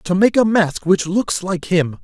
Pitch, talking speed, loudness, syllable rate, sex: 185 Hz, 235 wpm, -17 LUFS, 4.0 syllables/s, male